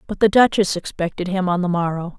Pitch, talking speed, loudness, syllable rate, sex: 185 Hz, 220 wpm, -19 LUFS, 5.9 syllables/s, female